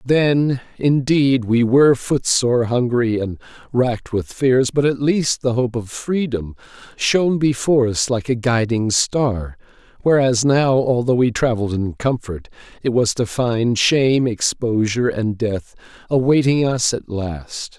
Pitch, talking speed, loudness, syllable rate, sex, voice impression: 125 Hz, 145 wpm, -18 LUFS, 4.2 syllables/s, male, masculine, slightly old, powerful, muffled, sincere, mature, friendly, reassuring, wild, kind